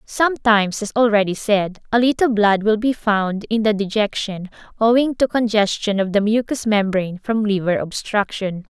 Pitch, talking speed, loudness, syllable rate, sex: 215 Hz, 160 wpm, -18 LUFS, 4.9 syllables/s, female